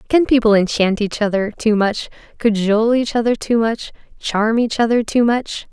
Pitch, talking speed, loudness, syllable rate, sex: 225 Hz, 180 wpm, -17 LUFS, 4.8 syllables/s, female